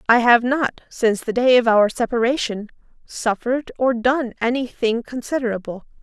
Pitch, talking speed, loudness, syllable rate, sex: 240 Hz, 150 wpm, -19 LUFS, 5.0 syllables/s, female